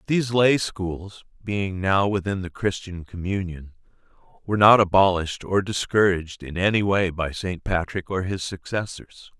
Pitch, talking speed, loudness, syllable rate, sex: 95 Hz, 145 wpm, -23 LUFS, 4.7 syllables/s, male